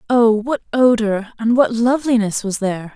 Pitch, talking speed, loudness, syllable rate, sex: 225 Hz, 160 wpm, -17 LUFS, 5.1 syllables/s, female